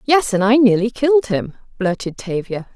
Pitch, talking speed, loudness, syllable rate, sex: 220 Hz, 175 wpm, -17 LUFS, 5.1 syllables/s, female